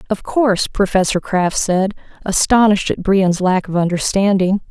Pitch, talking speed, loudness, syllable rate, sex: 195 Hz, 140 wpm, -16 LUFS, 4.8 syllables/s, female